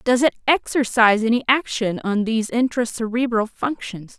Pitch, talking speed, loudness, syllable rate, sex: 235 Hz, 145 wpm, -20 LUFS, 5.1 syllables/s, female